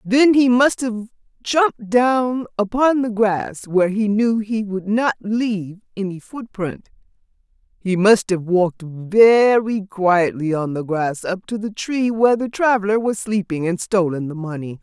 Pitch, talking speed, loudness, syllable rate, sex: 205 Hz, 160 wpm, -18 LUFS, 4.2 syllables/s, female